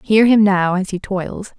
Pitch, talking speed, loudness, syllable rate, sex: 200 Hz, 225 wpm, -16 LUFS, 4.1 syllables/s, female